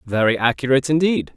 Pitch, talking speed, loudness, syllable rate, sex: 135 Hz, 130 wpm, -18 LUFS, 6.4 syllables/s, male